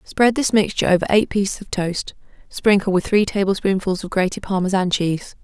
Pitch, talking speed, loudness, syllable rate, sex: 195 Hz, 175 wpm, -19 LUFS, 5.7 syllables/s, female